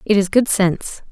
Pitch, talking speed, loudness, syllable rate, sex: 200 Hz, 215 wpm, -16 LUFS, 5.4 syllables/s, female